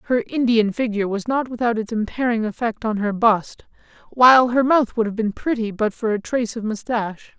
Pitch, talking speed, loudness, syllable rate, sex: 225 Hz, 205 wpm, -20 LUFS, 5.5 syllables/s, male